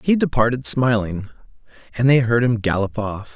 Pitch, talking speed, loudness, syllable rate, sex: 115 Hz, 160 wpm, -19 LUFS, 5.0 syllables/s, male